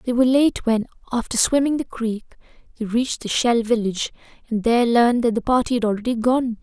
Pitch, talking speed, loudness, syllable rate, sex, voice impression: 235 Hz, 200 wpm, -20 LUFS, 6.2 syllables/s, female, feminine, slightly young, relaxed, slightly weak, soft, raspy, calm, friendly, lively, kind, modest